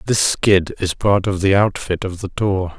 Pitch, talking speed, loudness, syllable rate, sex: 95 Hz, 215 wpm, -18 LUFS, 4.4 syllables/s, male